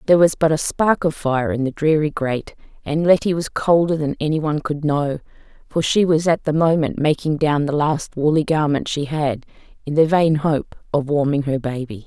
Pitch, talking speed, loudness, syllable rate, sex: 150 Hz, 210 wpm, -19 LUFS, 5.2 syllables/s, female